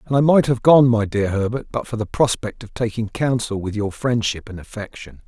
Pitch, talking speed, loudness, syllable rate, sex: 115 Hz, 225 wpm, -19 LUFS, 5.3 syllables/s, male